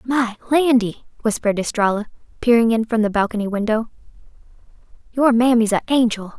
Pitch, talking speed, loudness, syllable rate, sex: 230 Hz, 130 wpm, -18 LUFS, 5.7 syllables/s, female